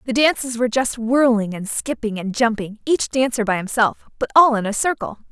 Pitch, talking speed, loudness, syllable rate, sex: 235 Hz, 205 wpm, -19 LUFS, 5.4 syllables/s, female